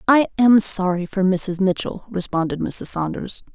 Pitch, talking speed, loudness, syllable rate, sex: 195 Hz, 150 wpm, -19 LUFS, 4.5 syllables/s, female